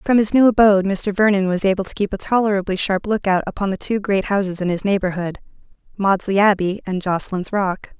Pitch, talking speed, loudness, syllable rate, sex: 195 Hz, 205 wpm, -18 LUFS, 6.1 syllables/s, female